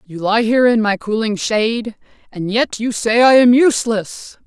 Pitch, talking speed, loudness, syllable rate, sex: 225 Hz, 190 wpm, -15 LUFS, 4.8 syllables/s, female